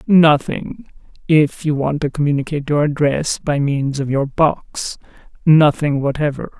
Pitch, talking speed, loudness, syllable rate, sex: 145 Hz, 120 wpm, -17 LUFS, 4.3 syllables/s, female